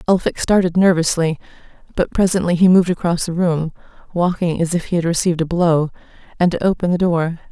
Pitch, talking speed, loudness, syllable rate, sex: 170 Hz, 175 wpm, -17 LUFS, 6.1 syllables/s, female